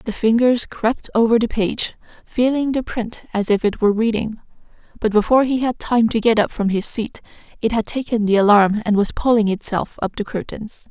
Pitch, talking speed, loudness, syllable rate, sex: 225 Hz, 205 wpm, -19 LUFS, 5.2 syllables/s, female